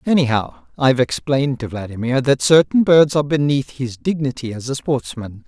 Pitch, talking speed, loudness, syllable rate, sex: 130 Hz, 165 wpm, -18 LUFS, 5.4 syllables/s, male